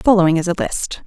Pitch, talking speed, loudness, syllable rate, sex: 180 Hz, 225 wpm, -17 LUFS, 5.9 syllables/s, female